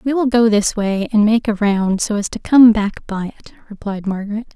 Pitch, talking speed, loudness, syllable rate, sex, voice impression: 215 Hz, 235 wpm, -16 LUFS, 5.2 syllables/s, female, very feminine, very young, very thin, tensed, powerful, bright, slightly soft, very clear, very fluent, slightly halting, very cute, intellectual, very refreshing, sincere, calm, friendly, reassuring, very unique, elegant, slightly wild, slightly sweet, slightly lively, very kind